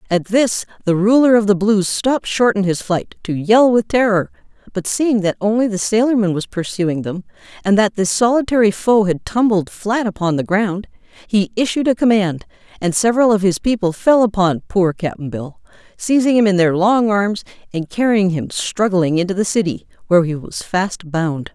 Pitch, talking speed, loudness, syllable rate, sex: 200 Hz, 190 wpm, -16 LUFS, 5.0 syllables/s, female